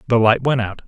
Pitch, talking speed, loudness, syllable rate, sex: 115 Hz, 275 wpm, -17 LUFS, 6.3 syllables/s, male